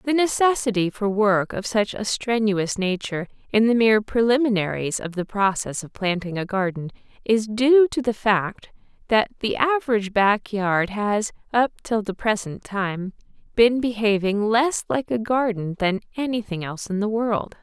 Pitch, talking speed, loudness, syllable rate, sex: 215 Hz, 165 wpm, -22 LUFS, 4.7 syllables/s, female